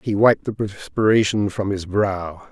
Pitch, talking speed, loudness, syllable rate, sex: 100 Hz, 165 wpm, -20 LUFS, 4.2 syllables/s, male